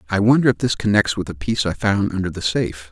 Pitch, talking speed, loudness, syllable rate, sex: 100 Hz, 270 wpm, -19 LUFS, 6.7 syllables/s, male